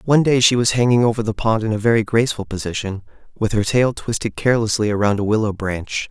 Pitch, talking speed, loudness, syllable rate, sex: 110 Hz, 215 wpm, -18 LUFS, 6.4 syllables/s, male